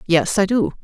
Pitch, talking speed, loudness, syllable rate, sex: 195 Hz, 215 wpm, -18 LUFS, 5.0 syllables/s, female